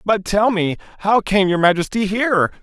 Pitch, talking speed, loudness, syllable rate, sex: 200 Hz, 185 wpm, -17 LUFS, 5.1 syllables/s, male